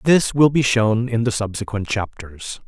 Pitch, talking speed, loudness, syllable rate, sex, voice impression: 115 Hz, 180 wpm, -19 LUFS, 4.3 syllables/s, male, masculine, adult-like, tensed, powerful, hard, clear, fluent, cool, intellectual, friendly, lively